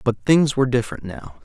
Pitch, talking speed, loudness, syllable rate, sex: 125 Hz, 210 wpm, -19 LUFS, 6.1 syllables/s, male